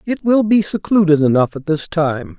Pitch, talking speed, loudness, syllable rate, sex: 170 Hz, 200 wpm, -15 LUFS, 5.0 syllables/s, male